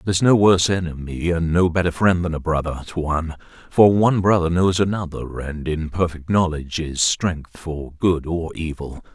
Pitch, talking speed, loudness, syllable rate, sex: 85 Hz, 175 wpm, -20 LUFS, 4.9 syllables/s, male